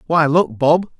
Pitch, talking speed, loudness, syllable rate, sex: 160 Hz, 180 wpm, -16 LUFS, 3.8 syllables/s, male